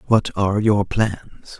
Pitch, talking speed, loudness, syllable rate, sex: 105 Hz, 150 wpm, -19 LUFS, 3.7 syllables/s, male